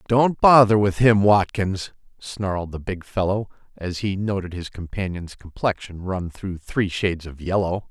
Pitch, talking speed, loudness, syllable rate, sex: 95 Hz, 160 wpm, -22 LUFS, 4.4 syllables/s, male